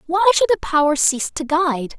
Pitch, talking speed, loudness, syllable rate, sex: 325 Hz, 210 wpm, -17 LUFS, 6.0 syllables/s, female